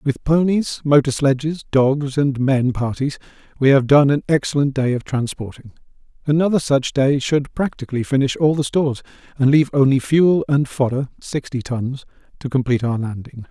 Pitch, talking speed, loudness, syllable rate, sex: 135 Hz, 160 wpm, -18 LUFS, 5.1 syllables/s, male